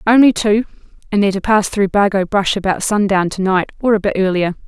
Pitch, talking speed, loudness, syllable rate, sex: 200 Hz, 220 wpm, -15 LUFS, 5.9 syllables/s, female